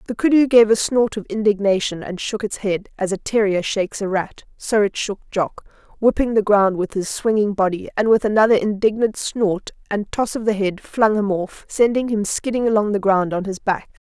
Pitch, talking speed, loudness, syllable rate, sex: 210 Hz, 215 wpm, -19 LUFS, 5.2 syllables/s, female